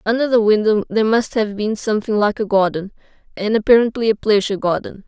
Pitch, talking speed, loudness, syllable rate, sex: 215 Hz, 190 wpm, -17 LUFS, 6.3 syllables/s, female